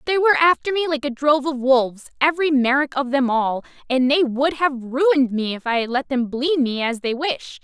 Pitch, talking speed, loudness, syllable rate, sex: 275 Hz, 220 wpm, -19 LUFS, 5.4 syllables/s, female